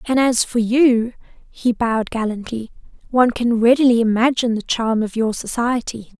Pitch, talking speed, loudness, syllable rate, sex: 235 Hz, 155 wpm, -18 LUFS, 5.1 syllables/s, female